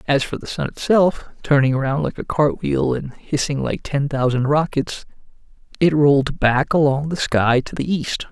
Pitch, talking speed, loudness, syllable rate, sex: 140 Hz, 180 wpm, -19 LUFS, 4.6 syllables/s, male